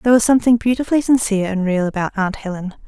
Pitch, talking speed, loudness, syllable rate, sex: 215 Hz, 210 wpm, -17 LUFS, 7.4 syllables/s, female